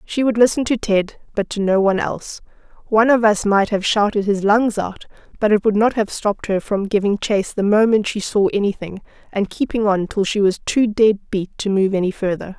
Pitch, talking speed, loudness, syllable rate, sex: 205 Hz, 225 wpm, -18 LUFS, 5.5 syllables/s, female